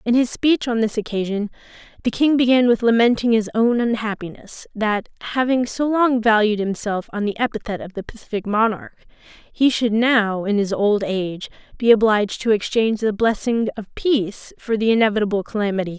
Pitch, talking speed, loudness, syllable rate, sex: 220 Hz, 180 wpm, -19 LUFS, 5.5 syllables/s, female